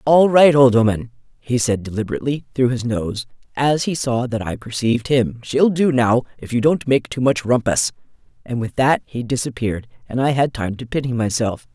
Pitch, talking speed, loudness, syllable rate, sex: 125 Hz, 200 wpm, -19 LUFS, 5.3 syllables/s, female